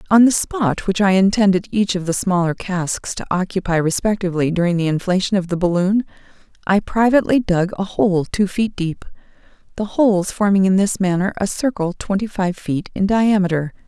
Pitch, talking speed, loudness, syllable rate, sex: 190 Hz, 175 wpm, -18 LUFS, 5.4 syllables/s, female